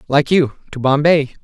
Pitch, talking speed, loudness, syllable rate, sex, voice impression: 145 Hz, 170 wpm, -16 LUFS, 4.5 syllables/s, male, very masculine, slightly young, slightly adult-like, slightly thick, slightly tensed, slightly weak, bright, slightly soft, clear, slightly fluent, slightly cool, intellectual, refreshing, very sincere, very calm, slightly friendly, slightly reassuring, very unique, elegant, slightly wild, sweet, slightly lively, kind, modest